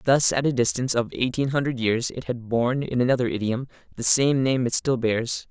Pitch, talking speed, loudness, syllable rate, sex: 125 Hz, 220 wpm, -23 LUFS, 5.5 syllables/s, male